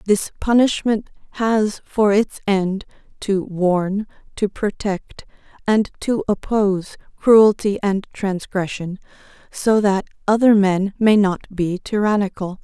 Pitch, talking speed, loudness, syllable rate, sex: 200 Hz, 115 wpm, -19 LUFS, 3.7 syllables/s, female